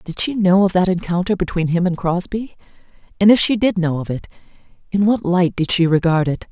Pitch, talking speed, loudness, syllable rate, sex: 180 Hz, 220 wpm, -17 LUFS, 5.6 syllables/s, female